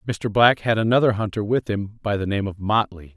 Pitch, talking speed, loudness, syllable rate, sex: 105 Hz, 230 wpm, -21 LUFS, 5.4 syllables/s, male